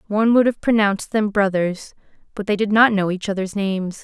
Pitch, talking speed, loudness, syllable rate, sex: 205 Hz, 210 wpm, -19 LUFS, 5.8 syllables/s, female